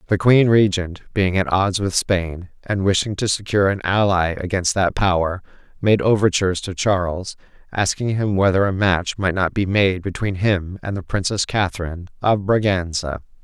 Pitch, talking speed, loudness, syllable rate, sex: 95 Hz, 170 wpm, -19 LUFS, 4.9 syllables/s, male